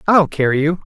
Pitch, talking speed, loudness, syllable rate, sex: 160 Hz, 195 wpm, -16 LUFS, 5.6 syllables/s, male